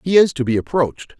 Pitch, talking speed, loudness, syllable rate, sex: 140 Hz, 250 wpm, -18 LUFS, 6.4 syllables/s, male